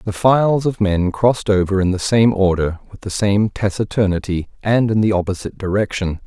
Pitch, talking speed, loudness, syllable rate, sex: 100 Hz, 180 wpm, -17 LUFS, 5.4 syllables/s, male